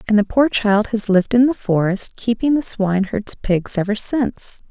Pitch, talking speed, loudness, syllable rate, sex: 215 Hz, 190 wpm, -18 LUFS, 4.9 syllables/s, female